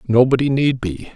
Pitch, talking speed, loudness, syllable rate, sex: 125 Hz, 155 wpm, -17 LUFS, 5.2 syllables/s, male